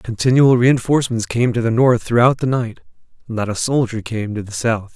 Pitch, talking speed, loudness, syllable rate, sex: 120 Hz, 195 wpm, -17 LUFS, 5.2 syllables/s, male